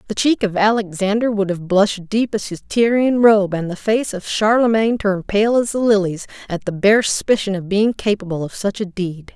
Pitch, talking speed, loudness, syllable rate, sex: 205 Hz, 210 wpm, -18 LUFS, 5.3 syllables/s, female